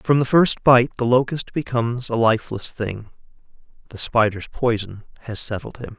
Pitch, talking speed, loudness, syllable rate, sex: 120 Hz, 160 wpm, -20 LUFS, 5.0 syllables/s, male